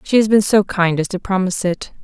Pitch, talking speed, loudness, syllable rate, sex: 190 Hz, 265 wpm, -17 LUFS, 5.9 syllables/s, female